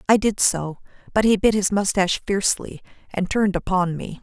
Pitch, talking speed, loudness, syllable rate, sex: 195 Hz, 185 wpm, -21 LUFS, 5.6 syllables/s, female